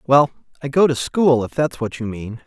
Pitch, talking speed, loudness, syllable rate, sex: 130 Hz, 245 wpm, -19 LUFS, 4.9 syllables/s, male